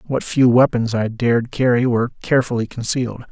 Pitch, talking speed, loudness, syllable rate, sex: 120 Hz, 165 wpm, -18 LUFS, 6.0 syllables/s, male